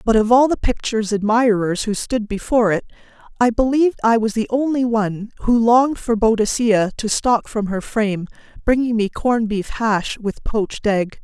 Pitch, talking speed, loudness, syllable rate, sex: 225 Hz, 180 wpm, -18 LUFS, 5.2 syllables/s, female